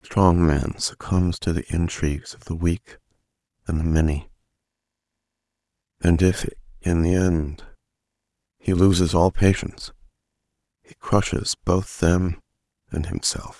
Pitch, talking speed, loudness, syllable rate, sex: 85 Hz, 125 wpm, -22 LUFS, 4.4 syllables/s, male